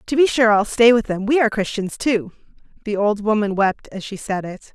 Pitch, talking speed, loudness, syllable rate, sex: 215 Hz, 240 wpm, -18 LUFS, 5.4 syllables/s, female